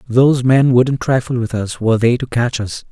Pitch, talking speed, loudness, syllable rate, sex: 120 Hz, 225 wpm, -15 LUFS, 5.2 syllables/s, male